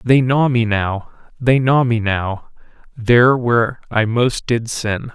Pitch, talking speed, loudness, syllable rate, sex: 120 Hz, 165 wpm, -16 LUFS, 3.8 syllables/s, male